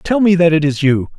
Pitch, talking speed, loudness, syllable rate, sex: 165 Hz, 305 wpm, -13 LUFS, 5.5 syllables/s, male